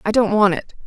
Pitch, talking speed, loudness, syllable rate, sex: 205 Hz, 275 wpm, -18 LUFS, 5.8 syllables/s, female